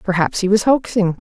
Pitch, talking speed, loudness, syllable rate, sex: 200 Hz, 190 wpm, -17 LUFS, 5.5 syllables/s, female